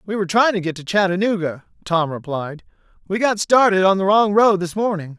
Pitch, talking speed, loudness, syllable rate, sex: 190 Hz, 210 wpm, -18 LUFS, 5.7 syllables/s, male